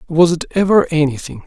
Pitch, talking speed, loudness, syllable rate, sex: 165 Hz, 165 wpm, -15 LUFS, 5.5 syllables/s, male